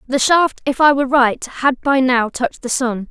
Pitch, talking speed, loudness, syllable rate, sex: 260 Hz, 230 wpm, -16 LUFS, 4.8 syllables/s, female